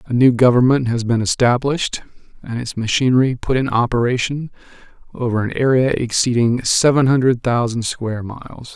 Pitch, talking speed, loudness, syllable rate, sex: 125 Hz, 145 wpm, -17 LUFS, 5.4 syllables/s, male